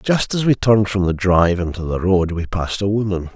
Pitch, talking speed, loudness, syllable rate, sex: 95 Hz, 250 wpm, -18 LUFS, 5.8 syllables/s, male